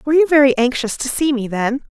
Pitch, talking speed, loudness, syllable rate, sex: 265 Hz, 245 wpm, -16 LUFS, 6.4 syllables/s, female